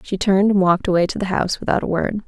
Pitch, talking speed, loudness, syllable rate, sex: 195 Hz, 290 wpm, -18 LUFS, 7.5 syllables/s, female